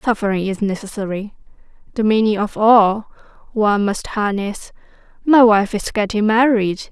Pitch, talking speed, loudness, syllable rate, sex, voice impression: 210 Hz, 130 wpm, -17 LUFS, 4.8 syllables/s, female, very feminine, young, very thin, slightly tensed, slightly weak, slightly bright, hard, clear, fluent, slightly raspy, very cute, intellectual, refreshing, sincere, calm, friendly, reassuring, unique, elegant, slightly wild, very sweet, slightly lively, kind, slightly intense, slightly sharp, slightly modest